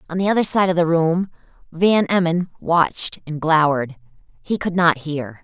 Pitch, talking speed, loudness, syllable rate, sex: 165 Hz, 175 wpm, -19 LUFS, 5.0 syllables/s, female